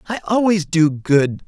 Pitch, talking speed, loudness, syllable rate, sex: 175 Hz, 160 wpm, -17 LUFS, 4.0 syllables/s, male